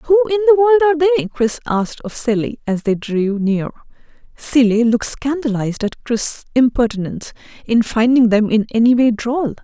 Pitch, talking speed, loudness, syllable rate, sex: 255 Hz, 170 wpm, -16 LUFS, 5.3 syllables/s, female